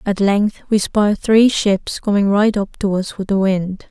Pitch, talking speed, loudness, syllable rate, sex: 200 Hz, 215 wpm, -16 LUFS, 4.1 syllables/s, female